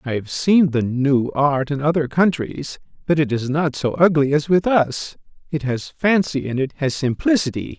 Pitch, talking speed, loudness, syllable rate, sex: 145 Hz, 195 wpm, -19 LUFS, 4.5 syllables/s, male